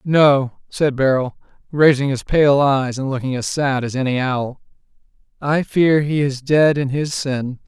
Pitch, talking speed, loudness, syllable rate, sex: 135 Hz, 170 wpm, -18 LUFS, 4.2 syllables/s, male